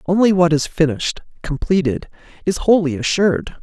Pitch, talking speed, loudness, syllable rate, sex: 165 Hz, 130 wpm, -18 LUFS, 5.6 syllables/s, male